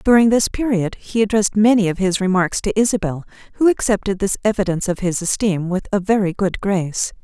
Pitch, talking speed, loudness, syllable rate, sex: 200 Hz, 190 wpm, -18 LUFS, 6.0 syllables/s, female